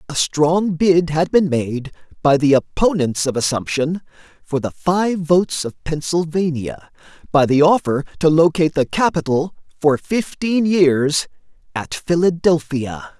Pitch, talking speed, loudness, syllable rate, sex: 160 Hz, 130 wpm, -18 LUFS, 4.2 syllables/s, male